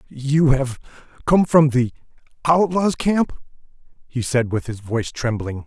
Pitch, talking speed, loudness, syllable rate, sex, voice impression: 135 Hz, 140 wpm, -20 LUFS, 4.1 syllables/s, male, very masculine, very adult-like, thick, slightly tensed, slightly powerful, slightly bright, soft, clear, fluent, cool, very intellectual, slightly refreshing, very sincere, very calm, very mature, friendly, reassuring, unique, elegant, wild, sweet, lively, slightly strict, slightly intense